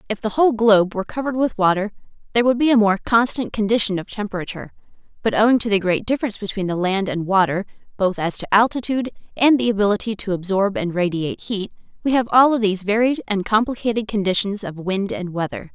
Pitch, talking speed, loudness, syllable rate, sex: 210 Hz, 200 wpm, -20 LUFS, 6.6 syllables/s, female